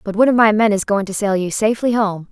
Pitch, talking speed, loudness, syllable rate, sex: 210 Hz, 310 wpm, -16 LUFS, 6.8 syllables/s, female